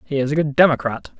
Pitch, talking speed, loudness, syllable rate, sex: 145 Hz, 250 wpm, -18 LUFS, 6.8 syllables/s, male